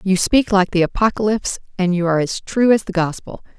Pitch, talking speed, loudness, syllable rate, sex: 195 Hz, 215 wpm, -18 LUFS, 5.9 syllables/s, female